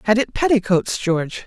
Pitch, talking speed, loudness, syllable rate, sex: 210 Hz, 165 wpm, -19 LUFS, 5.4 syllables/s, female